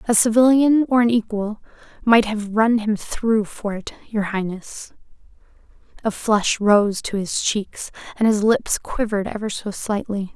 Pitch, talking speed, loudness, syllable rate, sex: 215 Hz, 155 wpm, -20 LUFS, 4.3 syllables/s, female